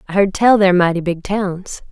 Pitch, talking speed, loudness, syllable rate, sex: 190 Hz, 220 wpm, -15 LUFS, 5.2 syllables/s, female